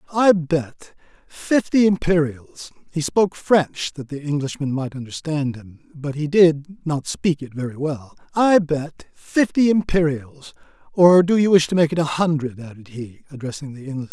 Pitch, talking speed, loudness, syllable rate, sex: 150 Hz, 155 wpm, -20 LUFS, 4.7 syllables/s, male